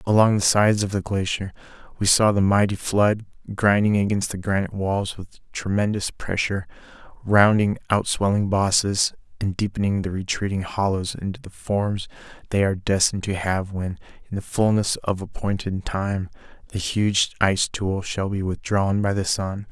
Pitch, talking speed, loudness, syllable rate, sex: 100 Hz, 160 wpm, -22 LUFS, 5.0 syllables/s, male